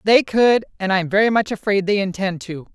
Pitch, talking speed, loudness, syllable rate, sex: 200 Hz, 220 wpm, -18 LUFS, 5.3 syllables/s, female